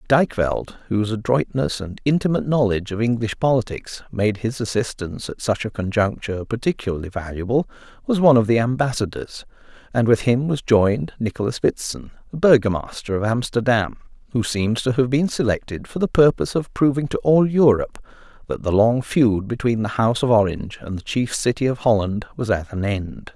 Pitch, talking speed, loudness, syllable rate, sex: 115 Hz, 170 wpm, -20 LUFS, 5.6 syllables/s, male